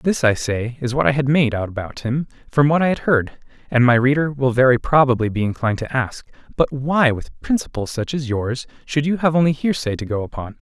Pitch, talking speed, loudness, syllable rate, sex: 130 Hz, 230 wpm, -19 LUFS, 5.5 syllables/s, male